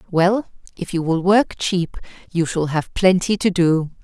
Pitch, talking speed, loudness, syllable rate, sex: 180 Hz, 180 wpm, -19 LUFS, 4.1 syllables/s, female